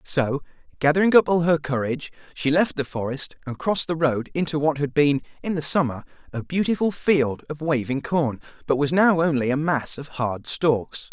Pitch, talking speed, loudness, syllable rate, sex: 150 Hz, 195 wpm, -23 LUFS, 5.1 syllables/s, male